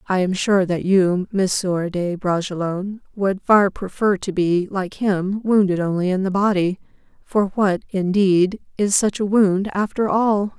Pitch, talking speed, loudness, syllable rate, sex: 190 Hz, 170 wpm, -19 LUFS, 4.2 syllables/s, female